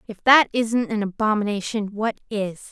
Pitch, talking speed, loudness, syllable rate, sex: 215 Hz, 155 wpm, -21 LUFS, 4.6 syllables/s, female